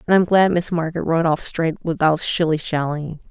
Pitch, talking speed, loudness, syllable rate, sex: 165 Hz, 200 wpm, -19 LUFS, 5.7 syllables/s, female